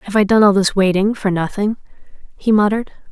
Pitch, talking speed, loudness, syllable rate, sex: 205 Hz, 195 wpm, -16 LUFS, 6.1 syllables/s, female